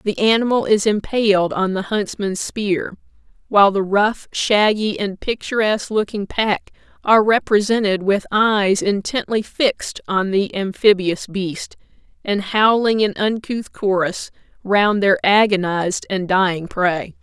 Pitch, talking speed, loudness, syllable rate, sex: 200 Hz, 130 wpm, -18 LUFS, 4.2 syllables/s, female